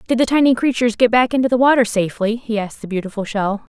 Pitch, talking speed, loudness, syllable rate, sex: 230 Hz, 240 wpm, -17 LUFS, 7.1 syllables/s, female